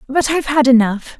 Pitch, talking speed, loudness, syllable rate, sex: 265 Hz, 200 wpm, -14 LUFS, 5.9 syllables/s, female